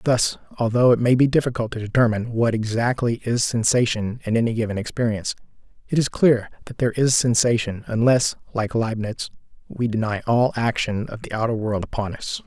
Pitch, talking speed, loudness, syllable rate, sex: 115 Hz, 175 wpm, -21 LUFS, 5.7 syllables/s, male